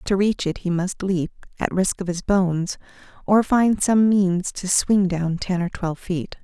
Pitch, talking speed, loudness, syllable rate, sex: 185 Hz, 205 wpm, -21 LUFS, 4.3 syllables/s, female